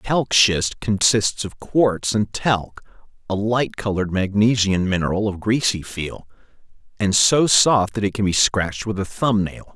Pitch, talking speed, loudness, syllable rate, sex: 105 Hz, 165 wpm, -19 LUFS, 4.2 syllables/s, male